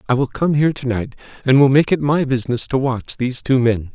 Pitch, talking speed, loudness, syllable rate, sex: 130 Hz, 260 wpm, -17 LUFS, 6.0 syllables/s, male